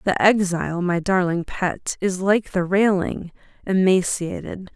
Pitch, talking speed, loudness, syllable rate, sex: 185 Hz, 125 wpm, -21 LUFS, 4.0 syllables/s, female